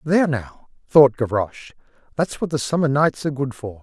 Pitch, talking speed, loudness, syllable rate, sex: 135 Hz, 190 wpm, -20 LUFS, 5.5 syllables/s, male